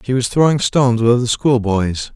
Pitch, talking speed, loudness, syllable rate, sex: 120 Hz, 195 wpm, -15 LUFS, 5.4 syllables/s, male